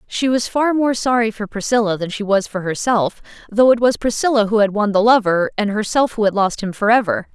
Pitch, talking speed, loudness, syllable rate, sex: 215 Hz, 230 wpm, -17 LUFS, 5.6 syllables/s, female